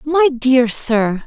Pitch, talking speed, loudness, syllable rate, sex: 260 Hz, 140 wpm, -15 LUFS, 2.6 syllables/s, female